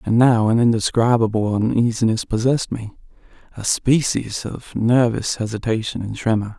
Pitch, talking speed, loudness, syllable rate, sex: 115 Hz, 120 wpm, -19 LUFS, 4.9 syllables/s, male